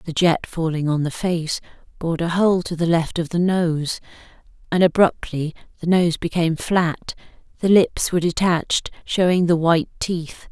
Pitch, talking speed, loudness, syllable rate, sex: 170 Hz, 165 wpm, -20 LUFS, 4.8 syllables/s, female